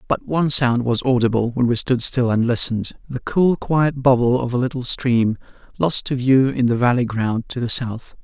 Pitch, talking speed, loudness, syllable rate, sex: 125 Hz, 205 wpm, -19 LUFS, 4.9 syllables/s, male